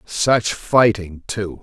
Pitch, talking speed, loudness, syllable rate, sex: 105 Hz, 110 wpm, -18 LUFS, 2.7 syllables/s, male